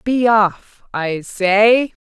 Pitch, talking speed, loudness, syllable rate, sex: 210 Hz, 120 wpm, -15 LUFS, 2.3 syllables/s, female